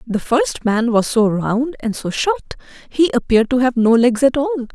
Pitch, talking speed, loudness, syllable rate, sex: 245 Hz, 215 wpm, -17 LUFS, 4.6 syllables/s, female